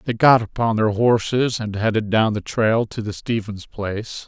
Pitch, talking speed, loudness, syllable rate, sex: 110 Hz, 195 wpm, -20 LUFS, 4.5 syllables/s, male